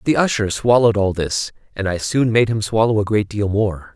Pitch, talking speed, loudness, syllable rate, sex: 105 Hz, 225 wpm, -18 LUFS, 5.3 syllables/s, male